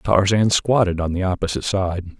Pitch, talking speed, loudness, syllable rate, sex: 95 Hz, 165 wpm, -19 LUFS, 5.3 syllables/s, male